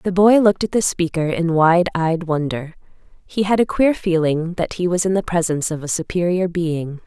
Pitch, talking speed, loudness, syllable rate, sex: 175 Hz, 210 wpm, -18 LUFS, 5.1 syllables/s, female